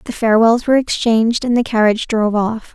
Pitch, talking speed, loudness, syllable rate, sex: 225 Hz, 195 wpm, -15 LUFS, 6.5 syllables/s, female